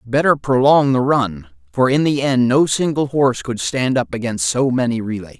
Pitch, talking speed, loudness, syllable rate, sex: 125 Hz, 200 wpm, -17 LUFS, 5.0 syllables/s, male